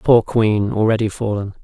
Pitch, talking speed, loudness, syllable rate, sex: 105 Hz, 145 wpm, -17 LUFS, 4.7 syllables/s, male